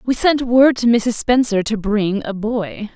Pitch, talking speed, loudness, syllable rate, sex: 230 Hz, 205 wpm, -16 LUFS, 3.9 syllables/s, female